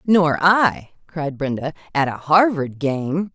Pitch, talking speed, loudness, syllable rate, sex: 160 Hz, 145 wpm, -19 LUFS, 3.5 syllables/s, female